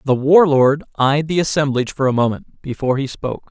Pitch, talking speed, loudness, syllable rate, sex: 140 Hz, 190 wpm, -17 LUFS, 5.8 syllables/s, male